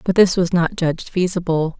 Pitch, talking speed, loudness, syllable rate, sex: 175 Hz, 200 wpm, -18 LUFS, 5.4 syllables/s, female